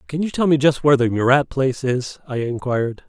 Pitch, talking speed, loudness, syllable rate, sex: 135 Hz, 235 wpm, -19 LUFS, 6.1 syllables/s, male